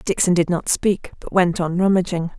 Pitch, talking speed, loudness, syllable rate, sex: 180 Hz, 200 wpm, -19 LUFS, 5.1 syllables/s, female